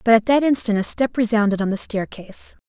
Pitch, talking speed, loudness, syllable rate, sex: 220 Hz, 225 wpm, -19 LUFS, 6.0 syllables/s, female